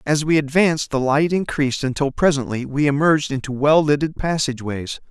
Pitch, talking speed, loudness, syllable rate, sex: 145 Hz, 165 wpm, -19 LUFS, 5.8 syllables/s, male